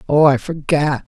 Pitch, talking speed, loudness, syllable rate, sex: 150 Hz, 150 wpm, -17 LUFS, 4.6 syllables/s, female